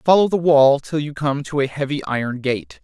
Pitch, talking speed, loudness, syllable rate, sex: 145 Hz, 235 wpm, -19 LUFS, 5.2 syllables/s, male